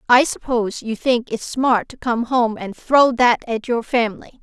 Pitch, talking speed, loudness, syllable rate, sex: 240 Hz, 205 wpm, -19 LUFS, 4.6 syllables/s, female